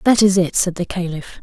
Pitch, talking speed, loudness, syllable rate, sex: 180 Hz, 250 wpm, -18 LUFS, 5.3 syllables/s, female